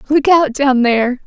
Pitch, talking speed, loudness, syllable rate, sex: 270 Hz, 190 wpm, -13 LUFS, 4.6 syllables/s, female